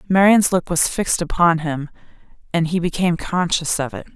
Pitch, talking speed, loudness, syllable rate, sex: 170 Hz, 175 wpm, -18 LUFS, 5.3 syllables/s, female